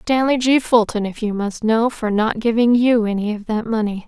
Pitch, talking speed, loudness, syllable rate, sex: 225 Hz, 220 wpm, -18 LUFS, 5.0 syllables/s, female